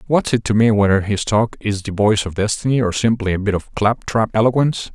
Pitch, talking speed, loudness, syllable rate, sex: 110 Hz, 245 wpm, -17 LUFS, 5.9 syllables/s, male